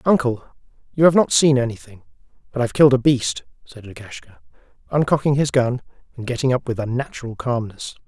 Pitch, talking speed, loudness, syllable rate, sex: 125 Hz, 165 wpm, -19 LUFS, 6.1 syllables/s, male